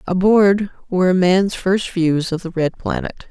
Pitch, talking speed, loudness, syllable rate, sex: 185 Hz, 165 wpm, -17 LUFS, 4.1 syllables/s, female